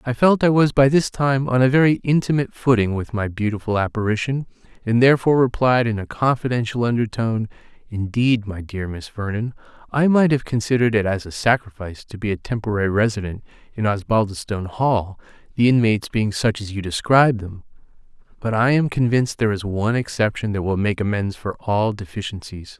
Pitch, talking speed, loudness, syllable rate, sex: 115 Hz, 175 wpm, -20 LUFS, 5.9 syllables/s, male